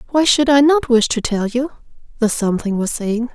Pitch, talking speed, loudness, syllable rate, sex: 245 Hz, 215 wpm, -16 LUFS, 5.4 syllables/s, female